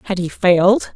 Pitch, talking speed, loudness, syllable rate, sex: 185 Hz, 190 wpm, -15 LUFS, 5.2 syllables/s, female